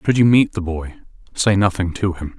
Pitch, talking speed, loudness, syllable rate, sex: 95 Hz, 225 wpm, -18 LUFS, 5.4 syllables/s, male